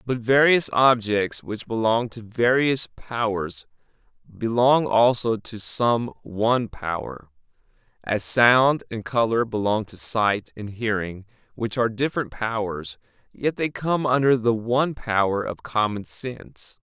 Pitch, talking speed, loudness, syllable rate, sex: 115 Hz, 130 wpm, -22 LUFS, 4.0 syllables/s, male